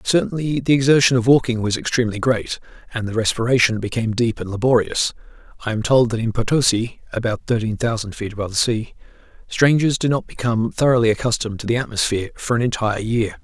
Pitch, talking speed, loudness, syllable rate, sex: 115 Hz, 185 wpm, -19 LUFS, 5.7 syllables/s, male